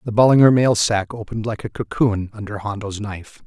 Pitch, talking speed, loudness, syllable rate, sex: 110 Hz, 190 wpm, -19 LUFS, 5.8 syllables/s, male